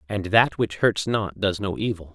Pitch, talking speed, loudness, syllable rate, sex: 100 Hz, 225 wpm, -23 LUFS, 4.6 syllables/s, male